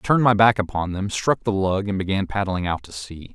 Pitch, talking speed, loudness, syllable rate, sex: 100 Hz, 270 wpm, -21 LUFS, 5.7 syllables/s, male